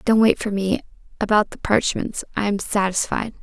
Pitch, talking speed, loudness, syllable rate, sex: 205 Hz, 175 wpm, -21 LUFS, 5.0 syllables/s, female